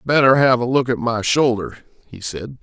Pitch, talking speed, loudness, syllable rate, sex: 120 Hz, 205 wpm, -17 LUFS, 4.8 syllables/s, male